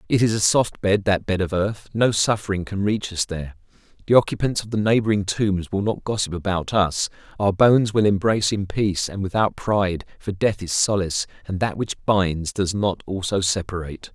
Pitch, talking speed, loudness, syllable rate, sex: 100 Hz, 200 wpm, -22 LUFS, 5.3 syllables/s, male